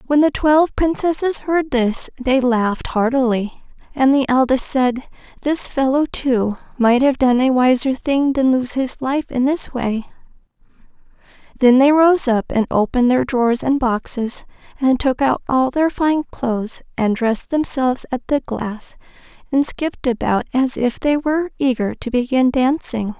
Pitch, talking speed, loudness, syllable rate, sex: 260 Hz, 165 wpm, -17 LUFS, 4.5 syllables/s, female